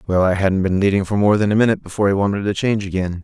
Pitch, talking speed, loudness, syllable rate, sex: 100 Hz, 295 wpm, -18 LUFS, 7.8 syllables/s, male